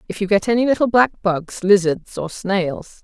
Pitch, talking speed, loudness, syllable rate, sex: 195 Hz, 180 wpm, -18 LUFS, 4.6 syllables/s, female